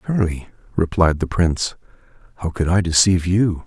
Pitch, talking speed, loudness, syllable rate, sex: 90 Hz, 145 wpm, -19 LUFS, 5.7 syllables/s, male